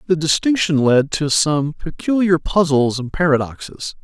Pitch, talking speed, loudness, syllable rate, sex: 160 Hz, 135 wpm, -17 LUFS, 4.5 syllables/s, male